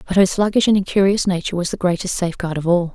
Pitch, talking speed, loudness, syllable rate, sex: 185 Hz, 245 wpm, -18 LUFS, 7.2 syllables/s, female